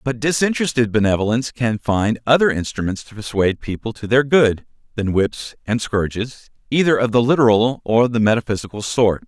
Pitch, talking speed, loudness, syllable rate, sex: 115 Hz, 160 wpm, -18 LUFS, 5.5 syllables/s, male